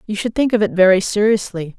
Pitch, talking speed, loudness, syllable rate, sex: 205 Hz, 235 wpm, -16 LUFS, 6.1 syllables/s, female